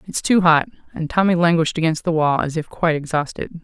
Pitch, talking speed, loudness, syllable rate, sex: 165 Hz, 215 wpm, -18 LUFS, 6.3 syllables/s, female